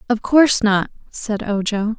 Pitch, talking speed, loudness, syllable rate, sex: 220 Hz, 150 wpm, -17 LUFS, 4.3 syllables/s, female